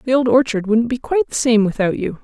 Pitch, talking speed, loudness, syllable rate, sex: 240 Hz, 270 wpm, -17 LUFS, 6.2 syllables/s, female